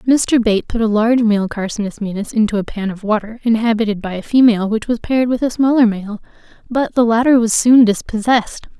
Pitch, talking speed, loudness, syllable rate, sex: 225 Hz, 205 wpm, -15 LUFS, 5.9 syllables/s, female